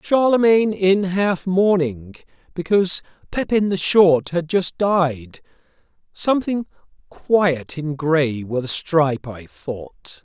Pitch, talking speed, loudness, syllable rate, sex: 170 Hz, 115 wpm, -19 LUFS, 3.6 syllables/s, male